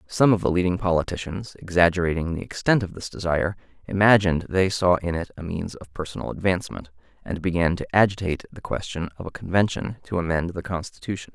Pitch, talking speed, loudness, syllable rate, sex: 90 Hz, 180 wpm, -24 LUFS, 6.3 syllables/s, male